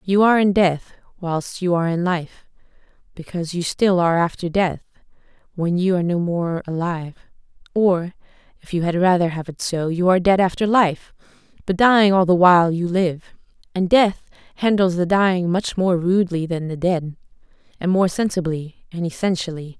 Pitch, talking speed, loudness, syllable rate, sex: 180 Hz, 175 wpm, -19 LUFS, 5.3 syllables/s, female